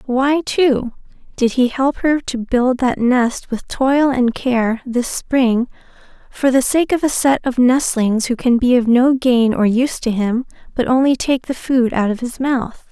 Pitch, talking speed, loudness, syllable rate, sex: 250 Hz, 200 wpm, -16 LUFS, 4.0 syllables/s, female